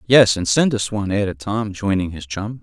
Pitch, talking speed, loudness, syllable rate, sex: 100 Hz, 230 wpm, -19 LUFS, 5.2 syllables/s, male